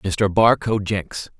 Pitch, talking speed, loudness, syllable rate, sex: 100 Hz, 130 wpm, -19 LUFS, 3.1 syllables/s, male